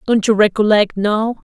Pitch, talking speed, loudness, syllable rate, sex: 215 Hz, 160 wpm, -15 LUFS, 4.6 syllables/s, male